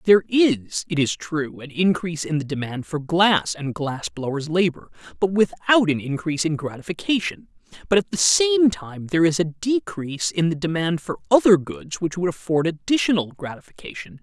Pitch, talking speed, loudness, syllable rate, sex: 165 Hz, 175 wpm, -21 LUFS, 5.2 syllables/s, male